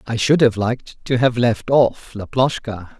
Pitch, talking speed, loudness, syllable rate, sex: 120 Hz, 180 wpm, -18 LUFS, 4.3 syllables/s, male